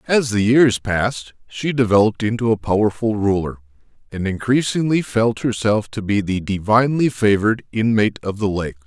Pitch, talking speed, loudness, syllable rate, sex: 110 Hz, 155 wpm, -18 LUFS, 5.4 syllables/s, male